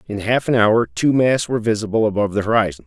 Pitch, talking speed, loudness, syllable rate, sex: 110 Hz, 230 wpm, -18 LUFS, 6.7 syllables/s, male